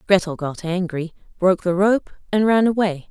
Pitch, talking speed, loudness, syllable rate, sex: 185 Hz, 175 wpm, -20 LUFS, 5.1 syllables/s, female